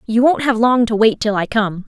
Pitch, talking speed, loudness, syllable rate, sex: 225 Hz, 290 wpm, -15 LUFS, 5.2 syllables/s, female